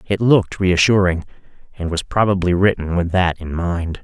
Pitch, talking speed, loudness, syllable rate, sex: 90 Hz, 150 wpm, -17 LUFS, 5.1 syllables/s, male